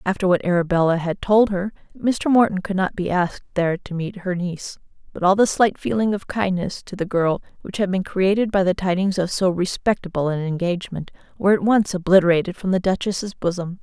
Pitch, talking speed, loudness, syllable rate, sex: 185 Hz, 205 wpm, -21 LUFS, 5.7 syllables/s, female